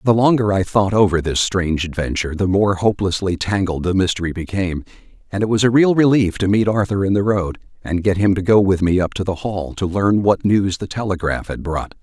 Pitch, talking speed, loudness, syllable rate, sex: 95 Hz, 230 wpm, -18 LUFS, 5.7 syllables/s, male